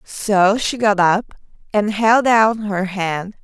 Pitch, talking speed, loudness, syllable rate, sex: 205 Hz, 155 wpm, -17 LUFS, 3.1 syllables/s, female